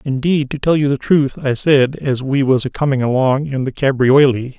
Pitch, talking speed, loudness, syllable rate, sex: 135 Hz, 225 wpm, -15 LUFS, 4.9 syllables/s, male